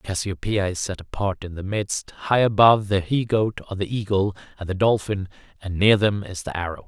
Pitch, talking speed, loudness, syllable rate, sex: 100 Hz, 210 wpm, -22 LUFS, 5.4 syllables/s, male